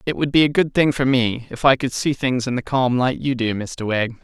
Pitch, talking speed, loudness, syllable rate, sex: 130 Hz, 300 wpm, -19 LUFS, 5.2 syllables/s, male